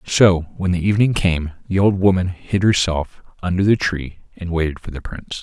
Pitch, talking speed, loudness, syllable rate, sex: 90 Hz, 200 wpm, -18 LUFS, 5.3 syllables/s, male